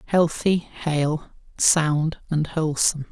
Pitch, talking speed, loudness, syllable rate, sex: 160 Hz, 95 wpm, -22 LUFS, 3.6 syllables/s, male